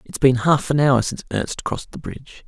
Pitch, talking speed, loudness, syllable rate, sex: 135 Hz, 240 wpm, -20 LUFS, 5.6 syllables/s, male